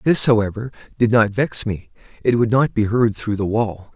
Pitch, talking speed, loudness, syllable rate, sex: 110 Hz, 210 wpm, -19 LUFS, 4.9 syllables/s, male